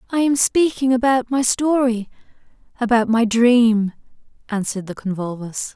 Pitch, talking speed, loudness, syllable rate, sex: 235 Hz, 115 wpm, -18 LUFS, 4.9 syllables/s, female